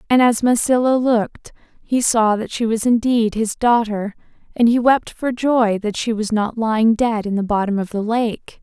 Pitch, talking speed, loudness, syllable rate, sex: 225 Hz, 200 wpm, -18 LUFS, 4.7 syllables/s, female